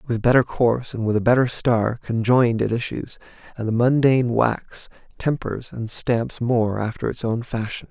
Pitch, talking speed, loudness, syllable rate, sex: 115 Hz, 175 wpm, -21 LUFS, 4.7 syllables/s, male